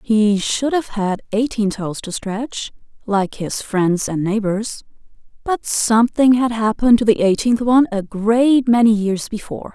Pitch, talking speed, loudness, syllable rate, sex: 220 Hz, 160 wpm, -17 LUFS, 4.3 syllables/s, female